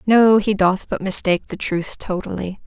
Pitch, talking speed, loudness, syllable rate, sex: 195 Hz, 180 wpm, -19 LUFS, 4.9 syllables/s, female